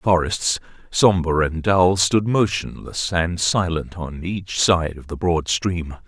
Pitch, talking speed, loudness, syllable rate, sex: 90 Hz, 160 wpm, -20 LUFS, 3.7 syllables/s, male